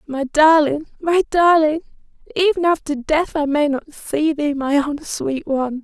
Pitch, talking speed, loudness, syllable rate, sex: 300 Hz, 165 wpm, -18 LUFS, 4.3 syllables/s, female